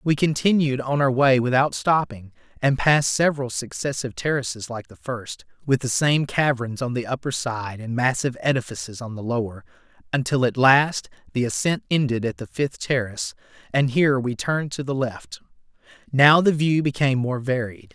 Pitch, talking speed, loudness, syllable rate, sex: 130 Hz, 175 wpm, -22 LUFS, 5.3 syllables/s, male